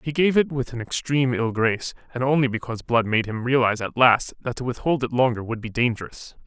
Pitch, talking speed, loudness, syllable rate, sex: 125 Hz, 230 wpm, -22 LUFS, 6.1 syllables/s, male